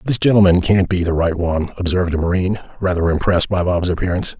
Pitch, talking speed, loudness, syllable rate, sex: 90 Hz, 205 wpm, -17 LUFS, 7.0 syllables/s, male